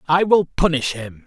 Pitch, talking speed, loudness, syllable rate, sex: 150 Hz, 190 wpm, -18 LUFS, 4.9 syllables/s, male